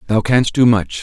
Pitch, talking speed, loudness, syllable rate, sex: 110 Hz, 235 wpm, -14 LUFS, 4.8 syllables/s, male